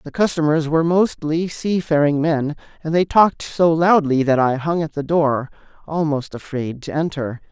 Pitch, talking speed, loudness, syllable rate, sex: 155 Hz, 170 wpm, -19 LUFS, 4.8 syllables/s, male